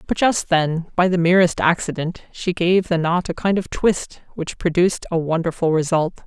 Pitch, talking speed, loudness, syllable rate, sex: 170 Hz, 190 wpm, -19 LUFS, 4.9 syllables/s, female